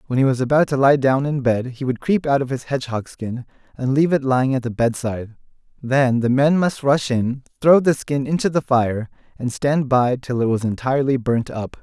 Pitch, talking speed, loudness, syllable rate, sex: 130 Hz, 230 wpm, -19 LUFS, 5.4 syllables/s, male